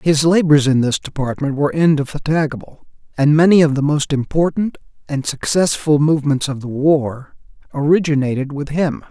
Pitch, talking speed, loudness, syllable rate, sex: 150 Hz, 145 wpm, -16 LUFS, 5.2 syllables/s, male